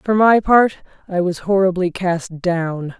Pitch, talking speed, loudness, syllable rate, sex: 185 Hz, 160 wpm, -17 LUFS, 3.9 syllables/s, female